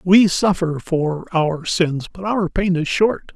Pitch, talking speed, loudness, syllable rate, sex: 175 Hz, 180 wpm, -19 LUFS, 3.4 syllables/s, male